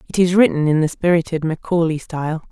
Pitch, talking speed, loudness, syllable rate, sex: 165 Hz, 190 wpm, -18 LUFS, 6.0 syllables/s, female